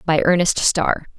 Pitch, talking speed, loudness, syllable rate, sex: 170 Hz, 150 wpm, -17 LUFS, 4.0 syllables/s, female